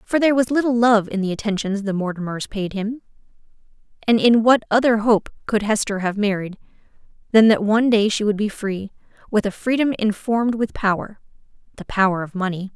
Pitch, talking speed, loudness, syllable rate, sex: 215 Hz, 185 wpm, -20 LUFS, 5.7 syllables/s, female